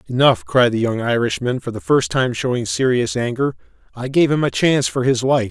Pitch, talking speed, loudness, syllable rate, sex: 130 Hz, 220 wpm, -18 LUFS, 5.5 syllables/s, male